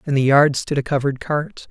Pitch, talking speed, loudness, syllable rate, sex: 140 Hz, 245 wpm, -18 LUFS, 5.7 syllables/s, male